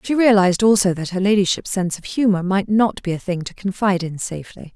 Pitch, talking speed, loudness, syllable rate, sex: 195 Hz, 225 wpm, -19 LUFS, 6.2 syllables/s, female